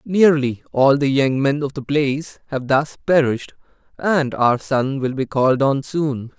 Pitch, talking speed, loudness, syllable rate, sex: 140 Hz, 180 wpm, -19 LUFS, 4.3 syllables/s, male